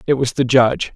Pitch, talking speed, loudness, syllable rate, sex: 125 Hz, 250 wpm, -16 LUFS, 6.2 syllables/s, male